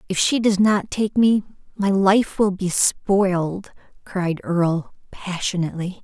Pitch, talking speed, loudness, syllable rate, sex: 190 Hz, 140 wpm, -20 LUFS, 4.0 syllables/s, female